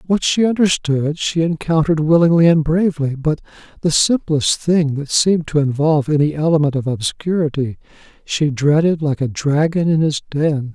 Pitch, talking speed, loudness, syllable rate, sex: 155 Hz, 155 wpm, -17 LUFS, 5.1 syllables/s, male